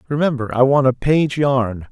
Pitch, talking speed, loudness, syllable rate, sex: 135 Hz, 190 wpm, -17 LUFS, 4.8 syllables/s, male